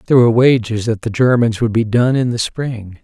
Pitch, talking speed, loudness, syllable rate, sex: 115 Hz, 235 wpm, -15 LUFS, 5.6 syllables/s, male